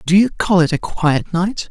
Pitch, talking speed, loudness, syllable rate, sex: 180 Hz, 245 wpm, -16 LUFS, 4.4 syllables/s, male